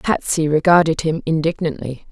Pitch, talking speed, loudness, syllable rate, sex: 160 Hz, 115 wpm, -17 LUFS, 5.0 syllables/s, female